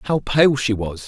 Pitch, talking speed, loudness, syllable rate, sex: 125 Hz, 225 wpm, -18 LUFS, 4.0 syllables/s, male